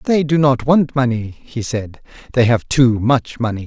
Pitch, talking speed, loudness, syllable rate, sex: 125 Hz, 195 wpm, -16 LUFS, 4.4 syllables/s, male